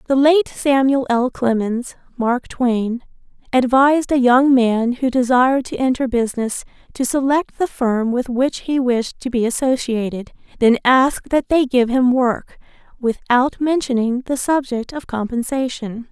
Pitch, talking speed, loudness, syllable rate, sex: 250 Hz, 150 wpm, -18 LUFS, 4.3 syllables/s, female